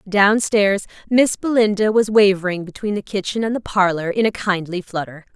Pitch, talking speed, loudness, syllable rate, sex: 200 Hz, 180 wpm, -18 LUFS, 5.1 syllables/s, female